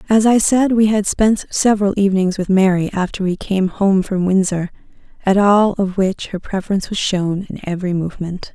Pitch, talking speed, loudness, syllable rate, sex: 195 Hz, 190 wpm, -17 LUFS, 5.3 syllables/s, female